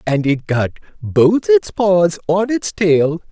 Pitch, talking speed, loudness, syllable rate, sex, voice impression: 170 Hz, 165 wpm, -15 LUFS, 3.3 syllables/s, male, very masculine, adult-like, slightly thick, slightly muffled, slightly unique, slightly wild